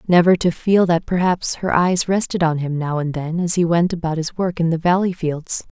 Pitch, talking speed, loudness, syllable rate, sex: 170 Hz, 240 wpm, -19 LUFS, 5.1 syllables/s, female